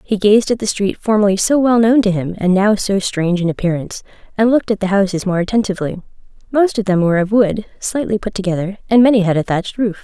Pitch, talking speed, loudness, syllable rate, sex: 205 Hz, 235 wpm, -15 LUFS, 6.5 syllables/s, female